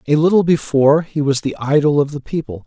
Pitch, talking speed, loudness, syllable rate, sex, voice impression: 145 Hz, 225 wpm, -16 LUFS, 6.0 syllables/s, male, masculine, middle-aged, thick, slightly powerful, hard, raspy, calm, mature, friendly, reassuring, wild, kind, slightly modest